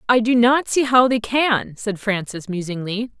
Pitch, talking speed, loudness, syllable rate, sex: 225 Hz, 190 wpm, -19 LUFS, 4.4 syllables/s, female